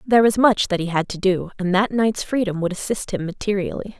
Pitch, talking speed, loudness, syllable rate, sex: 195 Hz, 240 wpm, -20 LUFS, 5.8 syllables/s, female